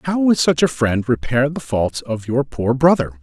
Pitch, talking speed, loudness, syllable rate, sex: 135 Hz, 225 wpm, -18 LUFS, 4.5 syllables/s, male